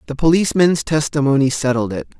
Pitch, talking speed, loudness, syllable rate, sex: 145 Hz, 135 wpm, -17 LUFS, 6.3 syllables/s, male